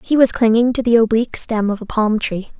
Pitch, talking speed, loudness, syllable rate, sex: 225 Hz, 255 wpm, -16 LUFS, 5.7 syllables/s, female